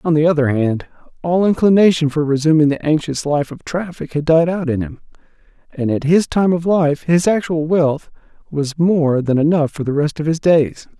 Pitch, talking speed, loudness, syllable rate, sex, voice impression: 155 Hz, 200 wpm, -16 LUFS, 5.0 syllables/s, male, very masculine, adult-like, slightly middle-aged, thick, tensed, slightly powerful, bright, soft, very clear, fluent, cool, intellectual, slightly refreshing, sincere, slightly calm, mature, very friendly, reassuring, unique, elegant, slightly wild, sweet, slightly lively, kind, slightly intense, slightly modest